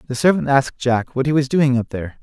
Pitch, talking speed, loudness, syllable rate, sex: 130 Hz, 270 wpm, -18 LUFS, 6.3 syllables/s, male